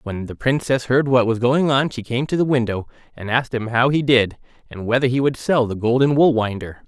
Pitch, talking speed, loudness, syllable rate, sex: 125 Hz, 245 wpm, -19 LUFS, 5.5 syllables/s, male